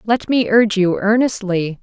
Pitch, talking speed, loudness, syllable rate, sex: 210 Hz, 165 wpm, -16 LUFS, 4.7 syllables/s, female